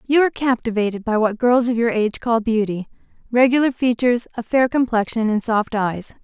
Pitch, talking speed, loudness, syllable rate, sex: 230 Hz, 185 wpm, -19 LUFS, 5.7 syllables/s, female